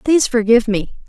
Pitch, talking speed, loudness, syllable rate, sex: 240 Hz, 165 wpm, -15 LUFS, 7.0 syllables/s, female